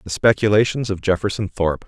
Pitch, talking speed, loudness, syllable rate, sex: 95 Hz, 160 wpm, -19 LUFS, 6.2 syllables/s, male